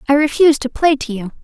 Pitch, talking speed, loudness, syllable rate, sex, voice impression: 280 Hz, 250 wpm, -15 LUFS, 6.8 syllables/s, female, feminine, slightly young, fluent, slightly cute, slightly calm, friendly, kind